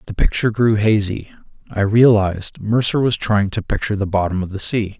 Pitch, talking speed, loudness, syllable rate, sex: 105 Hz, 190 wpm, -18 LUFS, 5.6 syllables/s, male